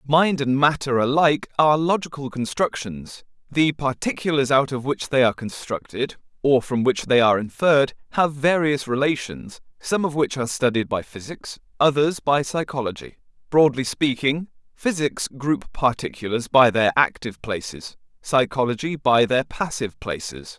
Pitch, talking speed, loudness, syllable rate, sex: 135 Hz, 140 wpm, -21 LUFS, 4.9 syllables/s, male